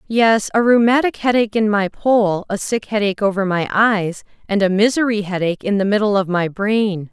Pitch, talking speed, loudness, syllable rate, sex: 205 Hz, 195 wpm, -17 LUFS, 5.3 syllables/s, female